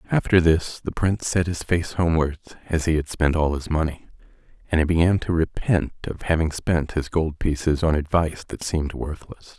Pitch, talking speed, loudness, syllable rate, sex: 80 Hz, 195 wpm, -23 LUFS, 5.3 syllables/s, male